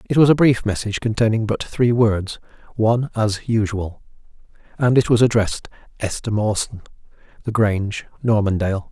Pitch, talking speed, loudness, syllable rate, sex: 110 Hz, 130 wpm, -19 LUFS, 5.5 syllables/s, male